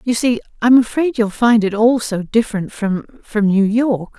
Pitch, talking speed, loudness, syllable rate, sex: 225 Hz, 170 wpm, -16 LUFS, 4.6 syllables/s, female